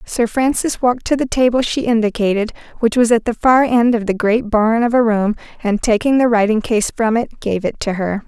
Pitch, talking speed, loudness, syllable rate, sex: 230 Hz, 230 wpm, -16 LUFS, 5.3 syllables/s, female